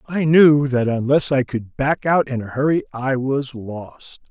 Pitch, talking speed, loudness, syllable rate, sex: 135 Hz, 195 wpm, -18 LUFS, 4.0 syllables/s, male